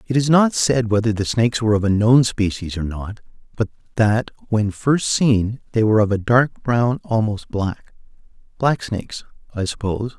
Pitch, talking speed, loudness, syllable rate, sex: 110 Hz, 175 wpm, -19 LUFS, 5.0 syllables/s, male